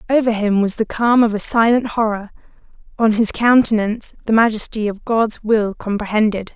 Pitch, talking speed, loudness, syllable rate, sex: 220 Hz, 165 wpm, -16 LUFS, 5.2 syllables/s, female